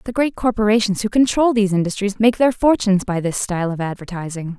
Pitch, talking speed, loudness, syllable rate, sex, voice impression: 205 Hz, 195 wpm, -18 LUFS, 6.3 syllables/s, female, very feminine, young, very thin, tensed, slightly weak, bright, slightly soft, clear, fluent, very cute, intellectual, very refreshing, sincere, calm, friendly, reassuring, unique, elegant, slightly wild, sweet, slightly lively, very kind, slightly modest, light